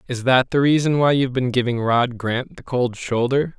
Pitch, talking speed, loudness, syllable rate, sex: 125 Hz, 220 wpm, -19 LUFS, 5.0 syllables/s, male